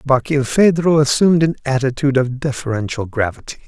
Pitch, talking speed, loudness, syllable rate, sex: 135 Hz, 115 wpm, -16 LUFS, 5.7 syllables/s, male